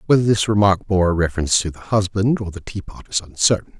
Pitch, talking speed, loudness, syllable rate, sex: 95 Hz, 205 wpm, -19 LUFS, 6.1 syllables/s, male